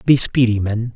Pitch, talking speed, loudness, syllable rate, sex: 115 Hz, 190 wpm, -16 LUFS, 4.4 syllables/s, male